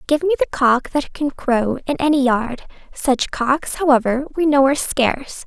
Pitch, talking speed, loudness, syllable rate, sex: 275 Hz, 185 wpm, -18 LUFS, 4.7 syllables/s, female